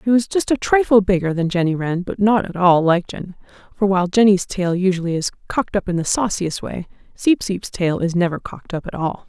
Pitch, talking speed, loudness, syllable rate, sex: 190 Hz, 235 wpm, -19 LUFS, 5.9 syllables/s, female